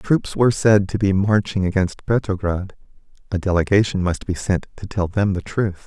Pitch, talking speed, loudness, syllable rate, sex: 100 Hz, 175 wpm, -20 LUFS, 5.1 syllables/s, male